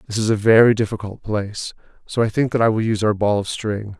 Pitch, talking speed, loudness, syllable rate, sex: 105 Hz, 255 wpm, -19 LUFS, 6.3 syllables/s, male